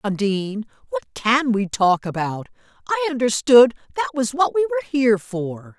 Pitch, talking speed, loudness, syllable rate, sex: 240 Hz, 145 wpm, -20 LUFS, 5.0 syllables/s, female